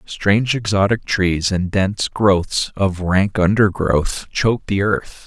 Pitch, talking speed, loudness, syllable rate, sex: 100 Hz, 135 wpm, -18 LUFS, 3.8 syllables/s, male